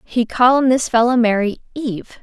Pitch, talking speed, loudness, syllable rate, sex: 240 Hz, 190 wpm, -16 LUFS, 5.4 syllables/s, female